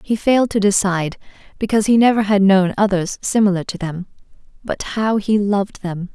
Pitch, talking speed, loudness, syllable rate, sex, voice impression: 200 Hz, 175 wpm, -17 LUFS, 5.6 syllables/s, female, feminine, slightly gender-neutral, slightly young, slightly adult-like, thin, tensed, powerful, bright, soft, very clear, fluent, slightly raspy, slightly cute, cool, very intellectual, very refreshing, sincere, very calm, very friendly, very reassuring, slightly unique, elegant, slightly wild, very sweet, lively, kind, slightly intense, slightly modest, light